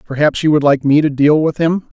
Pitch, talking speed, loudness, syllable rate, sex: 150 Hz, 270 wpm, -13 LUFS, 5.7 syllables/s, male